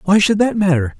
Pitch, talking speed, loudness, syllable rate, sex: 185 Hz, 240 wpm, -15 LUFS, 5.9 syllables/s, male